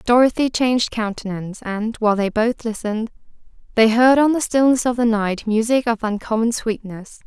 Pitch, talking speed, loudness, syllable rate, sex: 225 Hz, 165 wpm, -19 LUFS, 5.3 syllables/s, female